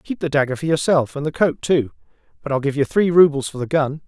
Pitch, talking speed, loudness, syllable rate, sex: 145 Hz, 265 wpm, -19 LUFS, 6.0 syllables/s, male